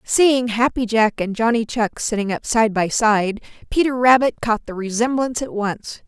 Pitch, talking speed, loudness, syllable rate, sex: 225 Hz, 180 wpm, -19 LUFS, 4.7 syllables/s, female